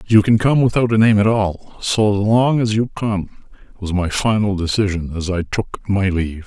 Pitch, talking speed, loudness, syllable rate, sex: 105 Hz, 205 wpm, -17 LUFS, 4.8 syllables/s, male